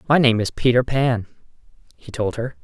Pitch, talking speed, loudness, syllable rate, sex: 120 Hz, 180 wpm, -20 LUFS, 5.2 syllables/s, male